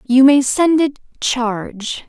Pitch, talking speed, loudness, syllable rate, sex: 260 Hz, 145 wpm, -16 LUFS, 3.4 syllables/s, female